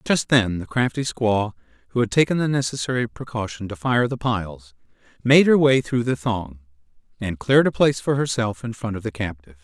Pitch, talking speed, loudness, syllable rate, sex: 115 Hz, 200 wpm, -21 LUFS, 5.6 syllables/s, male